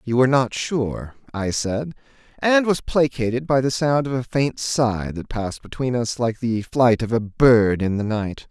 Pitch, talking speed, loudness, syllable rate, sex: 120 Hz, 205 wpm, -21 LUFS, 4.4 syllables/s, male